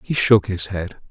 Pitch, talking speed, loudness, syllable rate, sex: 95 Hz, 215 wpm, -19 LUFS, 4.6 syllables/s, male